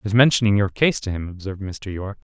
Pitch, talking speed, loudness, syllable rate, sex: 100 Hz, 260 wpm, -21 LUFS, 7.1 syllables/s, male